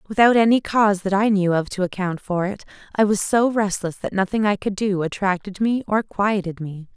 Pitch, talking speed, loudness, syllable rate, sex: 200 Hz, 215 wpm, -20 LUFS, 5.3 syllables/s, female